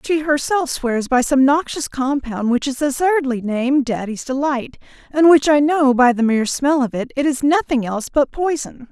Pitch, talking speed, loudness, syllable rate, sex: 270 Hz, 190 wpm, -17 LUFS, 4.8 syllables/s, female